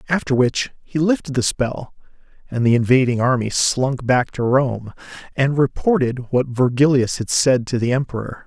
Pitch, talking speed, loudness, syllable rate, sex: 130 Hz, 165 wpm, -19 LUFS, 4.7 syllables/s, male